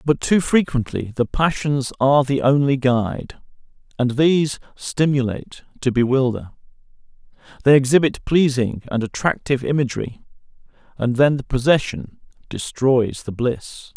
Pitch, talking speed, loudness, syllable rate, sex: 135 Hz, 115 wpm, -19 LUFS, 4.8 syllables/s, male